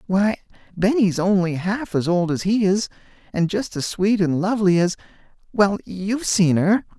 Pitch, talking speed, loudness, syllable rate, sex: 195 Hz, 165 wpm, -20 LUFS, 4.7 syllables/s, male